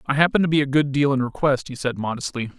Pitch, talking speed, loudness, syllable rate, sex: 140 Hz, 280 wpm, -21 LUFS, 6.6 syllables/s, male